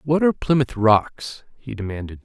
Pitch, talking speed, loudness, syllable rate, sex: 125 Hz, 160 wpm, -20 LUFS, 4.9 syllables/s, male